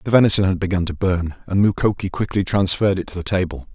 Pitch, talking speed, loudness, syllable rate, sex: 95 Hz, 225 wpm, -19 LUFS, 6.6 syllables/s, male